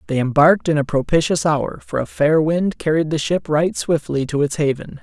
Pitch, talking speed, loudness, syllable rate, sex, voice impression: 155 Hz, 215 wpm, -18 LUFS, 5.2 syllables/s, male, very masculine, very middle-aged, slightly thick, tensed, very powerful, bright, slightly soft, clear, fluent, cool, intellectual, slightly refreshing, sincere, calm, very mature, very friendly, very reassuring, unique, slightly elegant, wild, sweet, lively, kind, slightly modest